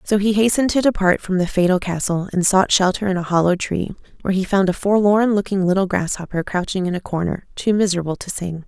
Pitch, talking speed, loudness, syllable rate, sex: 190 Hz, 220 wpm, -19 LUFS, 6.2 syllables/s, female